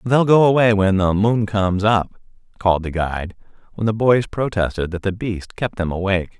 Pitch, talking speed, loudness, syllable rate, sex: 100 Hz, 195 wpm, -19 LUFS, 5.4 syllables/s, male